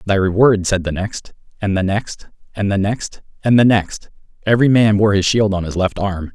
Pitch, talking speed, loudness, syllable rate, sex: 100 Hz, 190 wpm, -16 LUFS, 5.1 syllables/s, male